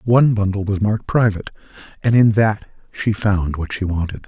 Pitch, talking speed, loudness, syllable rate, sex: 105 Hz, 180 wpm, -18 LUFS, 5.5 syllables/s, male